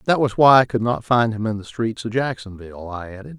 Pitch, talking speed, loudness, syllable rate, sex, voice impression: 110 Hz, 265 wpm, -19 LUFS, 5.9 syllables/s, male, masculine, slightly old, slightly soft, slightly sincere, calm, friendly, reassuring, kind